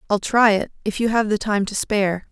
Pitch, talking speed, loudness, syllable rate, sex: 210 Hz, 260 wpm, -20 LUFS, 5.6 syllables/s, female